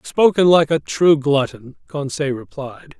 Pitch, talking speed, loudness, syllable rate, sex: 145 Hz, 140 wpm, -17 LUFS, 4.1 syllables/s, male